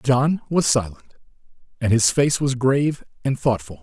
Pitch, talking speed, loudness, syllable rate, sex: 125 Hz, 155 wpm, -20 LUFS, 4.9 syllables/s, male